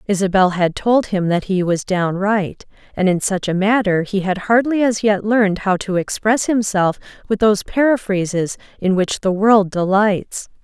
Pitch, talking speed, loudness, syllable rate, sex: 200 Hz, 175 wpm, -17 LUFS, 4.6 syllables/s, female